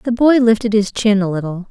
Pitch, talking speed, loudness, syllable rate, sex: 215 Hz, 245 wpm, -15 LUFS, 5.4 syllables/s, female